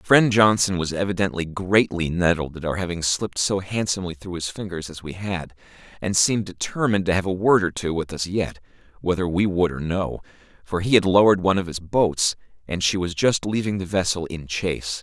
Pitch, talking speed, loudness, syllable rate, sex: 90 Hz, 210 wpm, -22 LUFS, 5.6 syllables/s, male